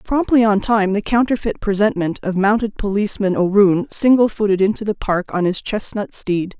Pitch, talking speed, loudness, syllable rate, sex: 205 Hz, 175 wpm, -17 LUFS, 5.2 syllables/s, female